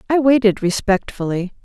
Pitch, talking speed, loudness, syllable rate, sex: 215 Hz, 110 wpm, -17 LUFS, 5.2 syllables/s, female